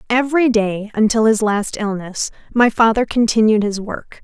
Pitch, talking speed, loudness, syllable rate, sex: 220 Hz, 155 wpm, -16 LUFS, 4.8 syllables/s, female